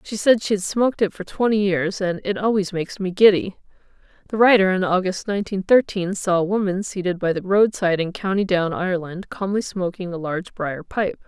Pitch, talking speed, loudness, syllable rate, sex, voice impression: 190 Hz, 200 wpm, -21 LUFS, 5.6 syllables/s, female, very feminine, very adult-like, slightly thin, slightly tensed, powerful, slightly dark, slightly hard, clear, fluent, slightly raspy, slightly cool, intellectual, refreshing, slightly sincere, calm, slightly friendly, slightly reassuring, unique, elegant, slightly wild, sweet, slightly lively, kind, slightly sharp, slightly modest